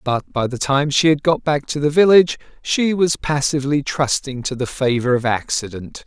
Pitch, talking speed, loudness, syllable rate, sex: 140 Hz, 200 wpm, -18 LUFS, 5.1 syllables/s, male